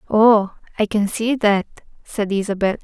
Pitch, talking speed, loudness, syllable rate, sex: 210 Hz, 150 wpm, -18 LUFS, 4.6 syllables/s, female